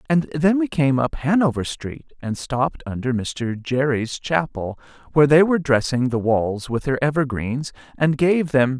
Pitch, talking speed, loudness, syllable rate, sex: 140 Hz, 170 wpm, -21 LUFS, 4.6 syllables/s, male